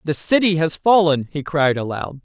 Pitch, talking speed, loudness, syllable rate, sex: 160 Hz, 190 wpm, -18 LUFS, 4.9 syllables/s, male